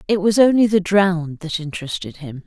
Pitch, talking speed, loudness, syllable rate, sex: 180 Hz, 195 wpm, -18 LUFS, 5.6 syllables/s, female